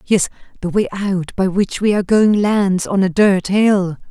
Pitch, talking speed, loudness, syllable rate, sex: 195 Hz, 205 wpm, -16 LUFS, 4.3 syllables/s, female